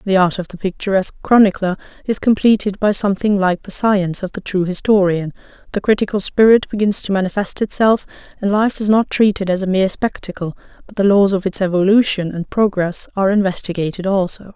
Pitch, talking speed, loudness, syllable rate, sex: 195 Hz, 180 wpm, -16 LUFS, 5.9 syllables/s, female